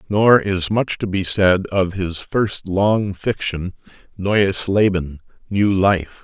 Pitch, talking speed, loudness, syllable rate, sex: 95 Hz, 145 wpm, -18 LUFS, 3.5 syllables/s, male